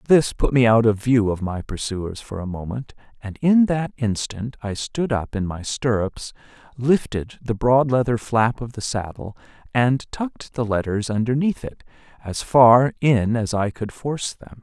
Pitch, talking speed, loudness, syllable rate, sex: 115 Hz, 180 wpm, -21 LUFS, 4.4 syllables/s, male